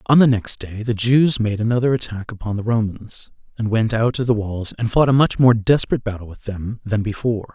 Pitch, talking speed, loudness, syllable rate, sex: 110 Hz, 230 wpm, -19 LUFS, 5.6 syllables/s, male